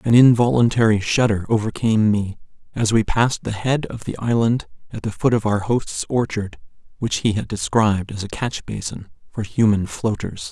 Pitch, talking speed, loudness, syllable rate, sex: 110 Hz, 175 wpm, -20 LUFS, 5.1 syllables/s, male